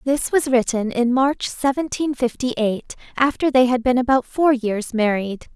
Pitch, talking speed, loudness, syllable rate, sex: 250 Hz, 175 wpm, -20 LUFS, 4.5 syllables/s, female